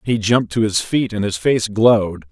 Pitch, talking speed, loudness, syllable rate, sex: 105 Hz, 235 wpm, -17 LUFS, 5.1 syllables/s, male